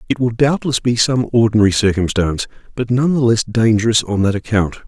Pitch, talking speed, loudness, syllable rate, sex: 115 Hz, 185 wpm, -16 LUFS, 5.8 syllables/s, male